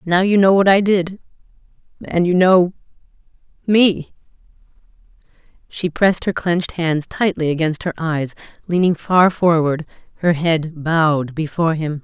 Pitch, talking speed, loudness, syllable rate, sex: 170 Hz, 125 wpm, -17 LUFS, 4.6 syllables/s, female